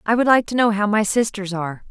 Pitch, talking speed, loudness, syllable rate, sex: 210 Hz, 285 wpm, -19 LUFS, 6.3 syllables/s, female